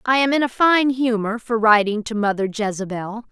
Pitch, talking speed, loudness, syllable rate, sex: 225 Hz, 200 wpm, -19 LUFS, 5.2 syllables/s, female